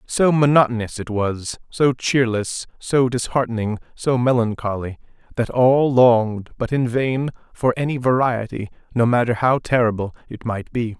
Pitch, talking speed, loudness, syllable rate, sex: 120 Hz, 140 wpm, -20 LUFS, 4.6 syllables/s, male